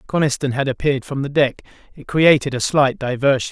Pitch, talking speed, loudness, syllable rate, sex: 135 Hz, 190 wpm, -18 LUFS, 5.9 syllables/s, male